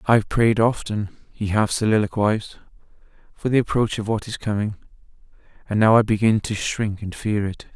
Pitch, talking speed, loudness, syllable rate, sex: 110 Hz, 170 wpm, -21 LUFS, 5.2 syllables/s, male